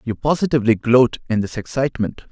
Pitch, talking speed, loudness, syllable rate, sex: 120 Hz, 155 wpm, -18 LUFS, 6.1 syllables/s, male